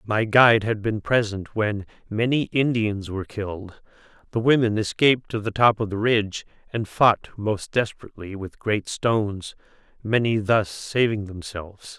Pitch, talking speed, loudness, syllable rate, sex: 105 Hz, 150 wpm, -23 LUFS, 4.7 syllables/s, male